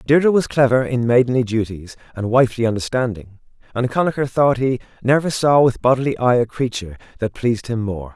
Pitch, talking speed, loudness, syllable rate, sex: 120 Hz, 175 wpm, -18 LUFS, 6.0 syllables/s, male